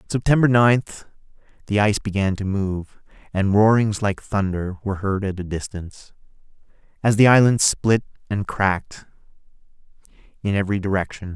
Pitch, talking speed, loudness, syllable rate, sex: 100 Hz, 130 wpm, -20 LUFS, 5.2 syllables/s, male